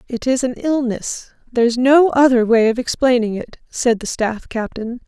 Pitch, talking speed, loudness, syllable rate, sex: 245 Hz, 175 wpm, -17 LUFS, 4.6 syllables/s, female